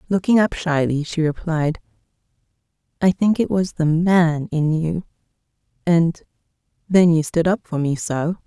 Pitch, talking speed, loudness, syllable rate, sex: 165 Hz, 135 wpm, -19 LUFS, 4.4 syllables/s, female